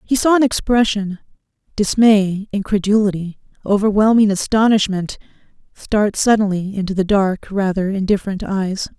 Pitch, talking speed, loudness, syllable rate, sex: 205 Hz, 95 wpm, -17 LUFS, 4.9 syllables/s, female